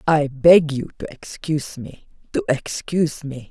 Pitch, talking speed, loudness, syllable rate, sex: 155 Hz, 155 wpm, -19 LUFS, 4.4 syllables/s, female